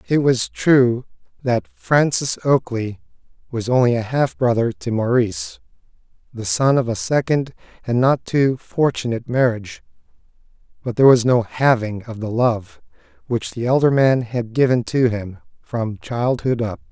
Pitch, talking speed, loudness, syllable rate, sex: 120 Hz, 150 wpm, -19 LUFS, 4.5 syllables/s, male